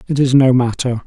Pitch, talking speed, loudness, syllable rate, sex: 130 Hz, 225 wpm, -14 LUFS, 5.5 syllables/s, male